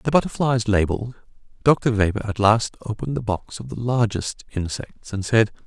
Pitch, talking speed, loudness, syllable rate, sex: 110 Hz, 170 wpm, -22 LUFS, 5.1 syllables/s, male